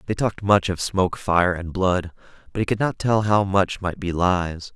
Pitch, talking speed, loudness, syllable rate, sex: 95 Hz, 225 wpm, -22 LUFS, 4.8 syllables/s, male